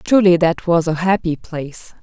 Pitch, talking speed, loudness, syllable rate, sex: 170 Hz, 180 wpm, -17 LUFS, 4.7 syllables/s, female